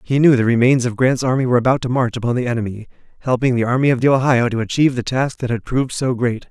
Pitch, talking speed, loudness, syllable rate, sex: 125 Hz, 265 wpm, -17 LUFS, 7.0 syllables/s, male